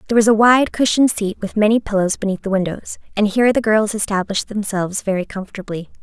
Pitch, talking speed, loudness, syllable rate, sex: 205 Hz, 200 wpm, -17 LUFS, 6.7 syllables/s, female